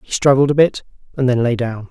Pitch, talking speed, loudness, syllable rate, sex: 130 Hz, 250 wpm, -16 LUFS, 6.0 syllables/s, male